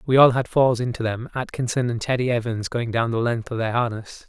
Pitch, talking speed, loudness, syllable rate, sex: 120 Hz, 240 wpm, -22 LUFS, 5.6 syllables/s, male